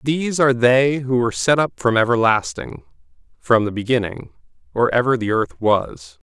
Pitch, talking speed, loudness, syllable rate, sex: 120 Hz, 160 wpm, -18 LUFS, 5.1 syllables/s, male